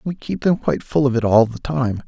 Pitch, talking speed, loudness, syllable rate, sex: 125 Hz, 290 wpm, -19 LUFS, 5.7 syllables/s, male